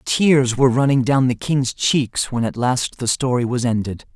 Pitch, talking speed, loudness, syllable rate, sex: 125 Hz, 200 wpm, -18 LUFS, 4.5 syllables/s, male